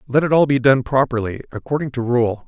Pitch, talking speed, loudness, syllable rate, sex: 125 Hz, 220 wpm, -18 LUFS, 5.9 syllables/s, male